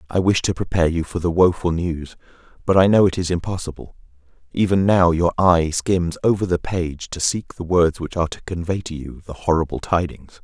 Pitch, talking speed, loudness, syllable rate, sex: 85 Hz, 205 wpm, -20 LUFS, 5.4 syllables/s, male